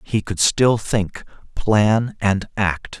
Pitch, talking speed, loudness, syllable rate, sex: 105 Hz, 140 wpm, -19 LUFS, 2.8 syllables/s, male